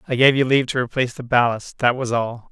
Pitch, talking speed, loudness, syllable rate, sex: 125 Hz, 265 wpm, -19 LUFS, 6.4 syllables/s, male